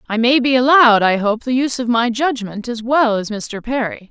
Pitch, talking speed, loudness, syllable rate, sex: 235 Hz, 235 wpm, -16 LUFS, 5.3 syllables/s, female